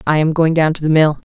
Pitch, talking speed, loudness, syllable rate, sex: 155 Hz, 320 wpm, -14 LUFS, 6.2 syllables/s, female